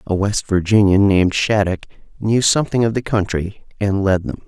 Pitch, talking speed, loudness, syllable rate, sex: 100 Hz, 175 wpm, -17 LUFS, 5.2 syllables/s, male